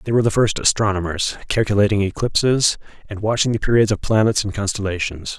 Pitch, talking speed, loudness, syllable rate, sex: 105 Hz, 165 wpm, -19 LUFS, 6.2 syllables/s, male